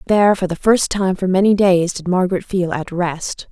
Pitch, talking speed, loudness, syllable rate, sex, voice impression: 185 Hz, 220 wpm, -17 LUFS, 5.1 syllables/s, female, feminine, adult-like, slightly intellectual, calm, sweet